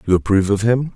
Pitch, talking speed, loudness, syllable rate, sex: 105 Hz, 250 wpm, -17 LUFS, 7.4 syllables/s, male